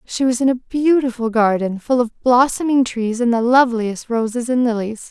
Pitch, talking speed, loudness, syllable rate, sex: 240 Hz, 190 wpm, -17 LUFS, 5.0 syllables/s, female